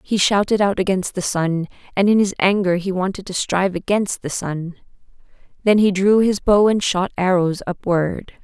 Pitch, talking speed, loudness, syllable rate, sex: 190 Hz, 185 wpm, -18 LUFS, 4.8 syllables/s, female